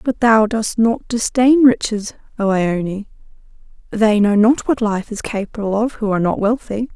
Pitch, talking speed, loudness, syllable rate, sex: 220 Hz, 175 wpm, -17 LUFS, 4.5 syllables/s, female